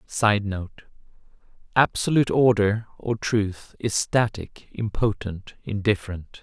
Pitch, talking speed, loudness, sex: 105 Hz, 85 wpm, -23 LUFS, male